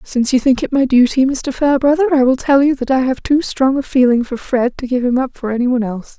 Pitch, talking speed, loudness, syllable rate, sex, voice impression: 260 Hz, 280 wpm, -15 LUFS, 6.3 syllables/s, female, feminine, adult-like, relaxed, powerful, soft, muffled, slightly raspy, intellectual, slightly calm, slightly reassuring, slightly strict, modest